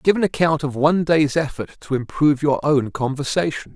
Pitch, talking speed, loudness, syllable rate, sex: 150 Hz, 190 wpm, -20 LUFS, 5.5 syllables/s, male